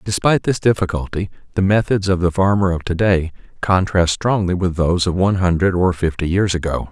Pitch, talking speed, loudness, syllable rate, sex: 90 Hz, 190 wpm, -18 LUFS, 5.8 syllables/s, male